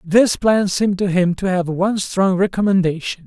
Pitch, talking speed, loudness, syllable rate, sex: 190 Hz, 185 wpm, -17 LUFS, 5.1 syllables/s, male